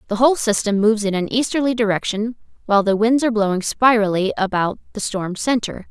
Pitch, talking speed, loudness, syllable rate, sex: 215 Hz, 185 wpm, -19 LUFS, 6.1 syllables/s, female